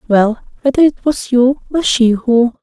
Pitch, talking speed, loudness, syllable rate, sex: 250 Hz, 160 wpm, -14 LUFS, 4.3 syllables/s, female